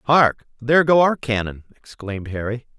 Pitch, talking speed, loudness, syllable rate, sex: 120 Hz, 150 wpm, -19 LUFS, 5.3 syllables/s, male